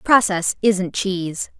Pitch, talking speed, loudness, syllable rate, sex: 195 Hz, 115 wpm, -19 LUFS, 3.6 syllables/s, female